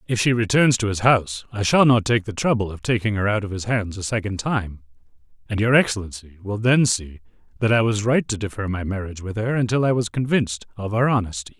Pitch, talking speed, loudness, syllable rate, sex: 105 Hz, 235 wpm, -21 LUFS, 6.0 syllables/s, male